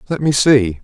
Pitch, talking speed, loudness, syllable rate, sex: 125 Hz, 215 wpm, -14 LUFS, 4.8 syllables/s, male